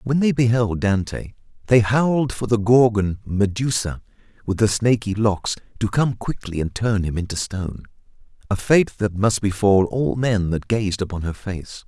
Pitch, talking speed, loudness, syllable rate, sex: 105 Hz, 165 wpm, -20 LUFS, 4.6 syllables/s, male